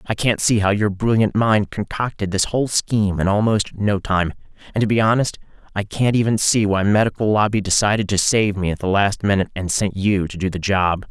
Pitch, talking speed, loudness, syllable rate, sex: 100 Hz, 220 wpm, -19 LUFS, 5.5 syllables/s, male